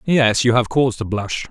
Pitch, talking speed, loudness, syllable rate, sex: 120 Hz, 240 wpm, -18 LUFS, 5.1 syllables/s, male